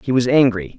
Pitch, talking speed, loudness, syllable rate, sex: 120 Hz, 230 wpm, -16 LUFS, 5.8 syllables/s, male